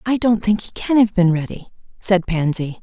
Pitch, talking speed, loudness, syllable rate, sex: 195 Hz, 210 wpm, -18 LUFS, 5.2 syllables/s, female